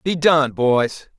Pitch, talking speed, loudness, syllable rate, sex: 145 Hz, 150 wpm, -18 LUFS, 2.9 syllables/s, male